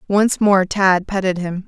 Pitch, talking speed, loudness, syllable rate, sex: 190 Hz, 180 wpm, -17 LUFS, 4.0 syllables/s, female